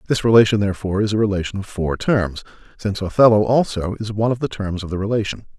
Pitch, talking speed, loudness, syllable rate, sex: 105 Hz, 215 wpm, -19 LUFS, 6.9 syllables/s, male